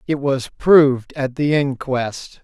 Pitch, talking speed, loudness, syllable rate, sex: 135 Hz, 150 wpm, -18 LUFS, 3.6 syllables/s, male